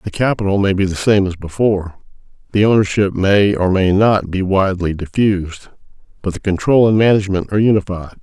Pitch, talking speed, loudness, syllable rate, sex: 100 Hz, 175 wpm, -15 LUFS, 5.8 syllables/s, male